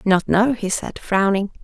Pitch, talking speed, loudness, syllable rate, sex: 205 Hz, 185 wpm, -19 LUFS, 4.2 syllables/s, female